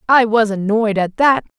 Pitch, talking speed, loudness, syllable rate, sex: 220 Hz, 190 wpm, -15 LUFS, 4.6 syllables/s, female